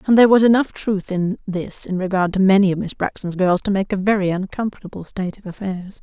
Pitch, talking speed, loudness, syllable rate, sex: 195 Hz, 230 wpm, -19 LUFS, 6.0 syllables/s, female